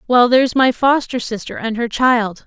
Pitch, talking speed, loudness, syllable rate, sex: 240 Hz, 195 wpm, -16 LUFS, 4.8 syllables/s, female